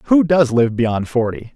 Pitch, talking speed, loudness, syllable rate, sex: 135 Hz, 195 wpm, -16 LUFS, 4.0 syllables/s, male